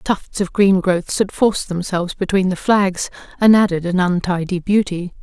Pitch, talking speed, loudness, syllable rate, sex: 185 Hz, 170 wpm, -17 LUFS, 4.8 syllables/s, female